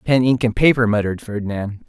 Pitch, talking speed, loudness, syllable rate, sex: 115 Hz, 190 wpm, -18 LUFS, 5.7 syllables/s, male